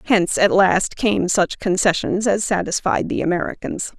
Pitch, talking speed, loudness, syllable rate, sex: 190 Hz, 150 wpm, -19 LUFS, 4.7 syllables/s, female